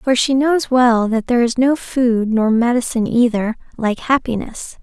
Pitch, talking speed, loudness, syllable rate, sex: 240 Hz, 175 wpm, -16 LUFS, 4.6 syllables/s, female